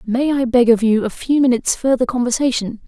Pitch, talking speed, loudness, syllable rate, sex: 245 Hz, 210 wpm, -16 LUFS, 5.8 syllables/s, female